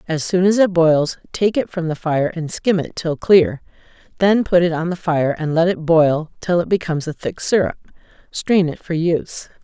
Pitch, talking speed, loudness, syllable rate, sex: 170 Hz, 205 wpm, -18 LUFS, 4.9 syllables/s, female